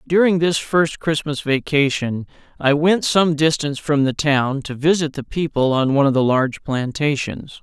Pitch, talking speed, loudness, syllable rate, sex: 145 Hz, 175 wpm, -18 LUFS, 4.8 syllables/s, male